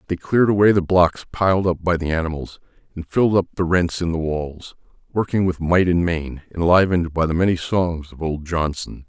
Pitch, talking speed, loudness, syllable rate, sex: 85 Hz, 205 wpm, -19 LUFS, 5.5 syllables/s, male